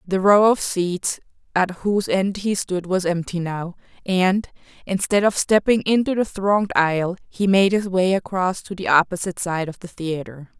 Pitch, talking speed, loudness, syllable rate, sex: 185 Hz, 180 wpm, -20 LUFS, 4.7 syllables/s, female